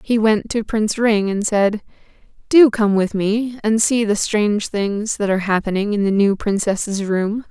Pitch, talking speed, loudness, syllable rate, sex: 210 Hz, 190 wpm, -18 LUFS, 4.5 syllables/s, female